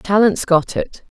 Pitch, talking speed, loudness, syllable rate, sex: 190 Hz, 150 wpm, -17 LUFS, 3.9 syllables/s, female